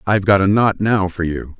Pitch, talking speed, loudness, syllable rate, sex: 95 Hz, 265 wpm, -16 LUFS, 5.5 syllables/s, male